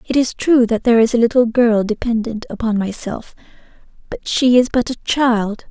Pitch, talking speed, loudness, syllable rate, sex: 235 Hz, 190 wpm, -16 LUFS, 5.1 syllables/s, female